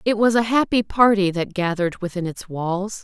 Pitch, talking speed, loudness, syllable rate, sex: 200 Hz, 195 wpm, -20 LUFS, 5.2 syllables/s, female